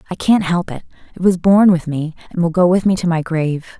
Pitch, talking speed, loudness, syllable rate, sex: 175 Hz, 270 wpm, -16 LUFS, 5.8 syllables/s, female